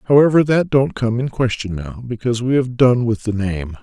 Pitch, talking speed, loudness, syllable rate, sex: 120 Hz, 220 wpm, -17 LUFS, 5.3 syllables/s, male